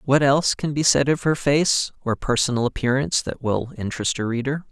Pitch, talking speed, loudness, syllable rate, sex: 130 Hz, 205 wpm, -21 LUFS, 5.5 syllables/s, male